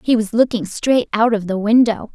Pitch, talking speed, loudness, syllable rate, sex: 220 Hz, 225 wpm, -17 LUFS, 5.0 syllables/s, female